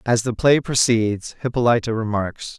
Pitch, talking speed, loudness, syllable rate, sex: 115 Hz, 140 wpm, -20 LUFS, 4.6 syllables/s, male